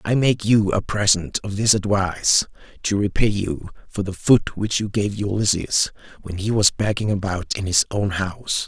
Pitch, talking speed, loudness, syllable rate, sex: 100 Hz, 185 wpm, -20 LUFS, 4.7 syllables/s, male